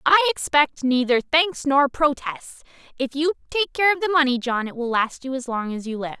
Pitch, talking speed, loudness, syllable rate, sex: 275 Hz, 225 wpm, -21 LUFS, 5.1 syllables/s, female